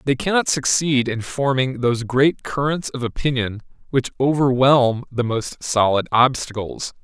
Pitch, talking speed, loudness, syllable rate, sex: 130 Hz, 135 wpm, -19 LUFS, 4.4 syllables/s, male